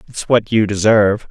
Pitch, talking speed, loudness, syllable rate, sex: 105 Hz, 185 wpm, -14 LUFS, 5.3 syllables/s, male